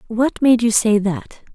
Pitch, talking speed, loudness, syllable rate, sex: 220 Hz, 195 wpm, -16 LUFS, 3.9 syllables/s, female